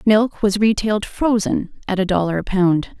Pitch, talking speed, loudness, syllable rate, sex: 205 Hz, 180 wpm, -19 LUFS, 4.7 syllables/s, female